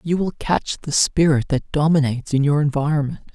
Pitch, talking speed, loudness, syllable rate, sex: 150 Hz, 180 wpm, -19 LUFS, 5.3 syllables/s, male